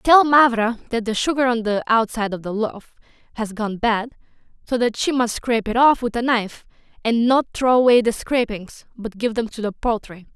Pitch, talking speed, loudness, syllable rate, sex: 230 Hz, 210 wpm, -20 LUFS, 5.3 syllables/s, female